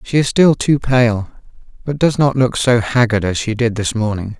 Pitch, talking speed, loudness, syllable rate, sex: 120 Hz, 220 wpm, -15 LUFS, 4.8 syllables/s, male